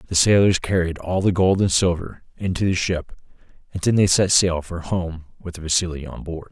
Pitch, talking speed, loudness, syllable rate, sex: 90 Hz, 205 wpm, -20 LUFS, 5.1 syllables/s, male